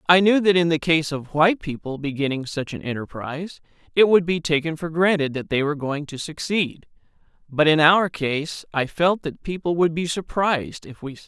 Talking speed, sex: 210 wpm, male